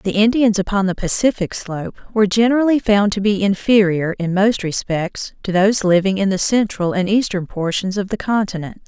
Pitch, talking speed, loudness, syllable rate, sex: 200 Hz, 180 wpm, -17 LUFS, 5.4 syllables/s, female